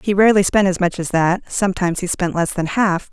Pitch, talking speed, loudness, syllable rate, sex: 185 Hz, 250 wpm, -17 LUFS, 6.0 syllables/s, female